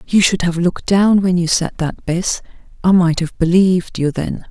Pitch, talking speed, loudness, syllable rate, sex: 175 Hz, 215 wpm, -16 LUFS, 4.9 syllables/s, female